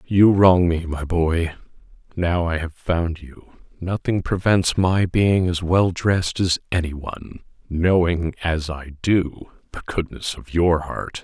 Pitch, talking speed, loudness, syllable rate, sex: 85 Hz, 155 wpm, -21 LUFS, 3.9 syllables/s, male